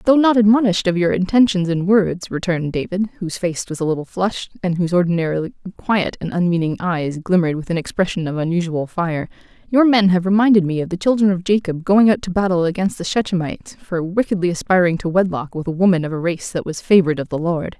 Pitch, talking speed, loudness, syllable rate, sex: 180 Hz, 215 wpm, -18 LUFS, 6.3 syllables/s, female